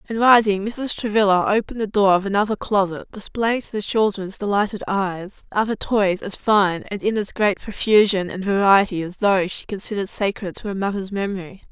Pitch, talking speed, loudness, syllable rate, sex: 200 Hz, 185 wpm, -20 LUFS, 5.4 syllables/s, female